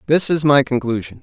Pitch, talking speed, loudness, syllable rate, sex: 140 Hz, 195 wpm, -16 LUFS, 5.7 syllables/s, male